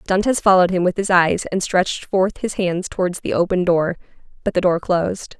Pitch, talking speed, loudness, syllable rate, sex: 185 Hz, 210 wpm, -19 LUFS, 5.4 syllables/s, female